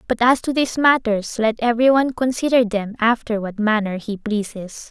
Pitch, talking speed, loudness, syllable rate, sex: 230 Hz, 185 wpm, -19 LUFS, 5.3 syllables/s, female